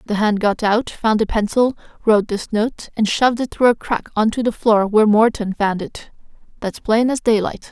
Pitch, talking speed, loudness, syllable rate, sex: 220 Hz, 220 wpm, -18 LUFS, 5.2 syllables/s, female